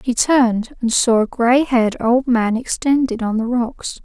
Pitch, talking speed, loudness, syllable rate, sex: 240 Hz, 195 wpm, -17 LUFS, 4.4 syllables/s, female